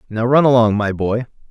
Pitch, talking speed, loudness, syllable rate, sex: 115 Hz, 200 wpm, -16 LUFS, 5.5 syllables/s, male